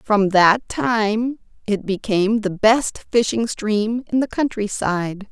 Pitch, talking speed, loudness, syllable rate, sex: 210 Hz, 145 wpm, -19 LUFS, 3.6 syllables/s, female